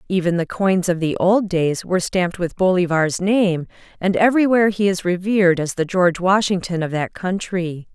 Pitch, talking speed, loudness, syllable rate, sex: 185 Hz, 180 wpm, -19 LUFS, 5.3 syllables/s, female